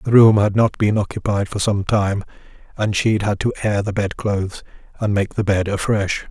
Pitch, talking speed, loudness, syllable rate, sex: 100 Hz, 210 wpm, -19 LUFS, 5.1 syllables/s, male